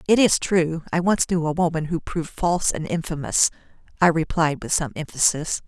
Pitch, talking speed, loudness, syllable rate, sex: 165 Hz, 190 wpm, -22 LUFS, 5.4 syllables/s, female